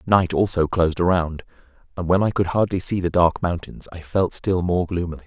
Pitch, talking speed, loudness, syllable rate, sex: 90 Hz, 205 wpm, -21 LUFS, 5.5 syllables/s, male